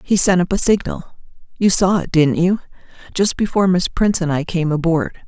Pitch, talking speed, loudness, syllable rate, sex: 180 Hz, 180 wpm, -17 LUFS, 5.5 syllables/s, female